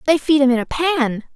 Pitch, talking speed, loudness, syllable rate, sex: 280 Hz, 265 wpm, -17 LUFS, 5.5 syllables/s, female